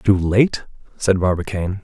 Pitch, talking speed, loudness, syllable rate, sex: 95 Hz, 130 wpm, -19 LUFS, 4.7 syllables/s, male